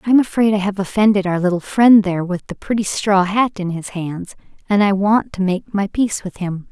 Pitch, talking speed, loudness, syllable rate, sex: 195 Hz, 240 wpm, -17 LUFS, 5.5 syllables/s, female